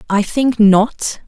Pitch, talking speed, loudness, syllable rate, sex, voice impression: 220 Hz, 140 wpm, -14 LUFS, 2.8 syllables/s, female, very feminine, slightly young, slightly adult-like, very thin, relaxed, weak, slightly bright, very soft, clear, fluent, slightly raspy, very cute, intellectual, very refreshing, sincere, very calm, very friendly, very reassuring, very unique, very elegant, slightly wild, very sweet, very lively, very kind, very modest, light